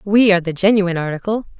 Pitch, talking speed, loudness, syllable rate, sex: 190 Hz, 190 wpm, -16 LUFS, 7.1 syllables/s, female